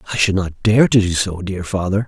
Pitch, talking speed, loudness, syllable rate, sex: 95 Hz, 260 wpm, -17 LUFS, 5.9 syllables/s, male